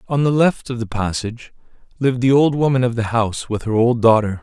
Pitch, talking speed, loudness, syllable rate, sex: 120 Hz, 230 wpm, -18 LUFS, 6.0 syllables/s, male